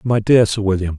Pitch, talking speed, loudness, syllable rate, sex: 105 Hz, 245 wpm, -15 LUFS, 5.6 syllables/s, male